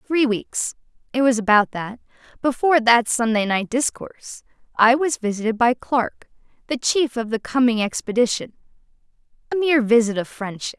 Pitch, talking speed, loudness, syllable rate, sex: 240 Hz, 135 wpm, -20 LUFS, 5.1 syllables/s, female